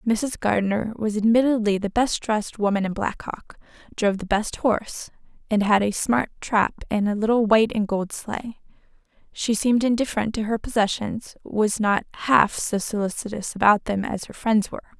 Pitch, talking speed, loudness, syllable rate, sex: 215 Hz, 175 wpm, -23 LUFS, 5.2 syllables/s, female